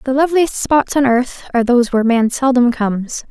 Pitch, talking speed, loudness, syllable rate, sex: 250 Hz, 200 wpm, -15 LUFS, 5.9 syllables/s, female